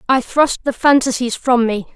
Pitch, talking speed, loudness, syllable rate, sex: 250 Hz, 185 wpm, -16 LUFS, 4.5 syllables/s, female